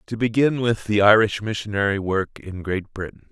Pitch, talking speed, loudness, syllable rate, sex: 105 Hz, 180 wpm, -21 LUFS, 5.1 syllables/s, male